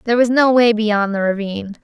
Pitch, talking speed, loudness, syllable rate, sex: 220 Hz, 230 wpm, -16 LUFS, 6.3 syllables/s, female